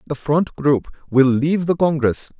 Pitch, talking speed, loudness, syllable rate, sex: 145 Hz, 175 wpm, -18 LUFS, 4.6 syllables/s, male